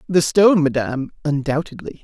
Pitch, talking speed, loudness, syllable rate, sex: 150 Hz, 120 wpm, -18 LUFS, 5.1 syllables/s, male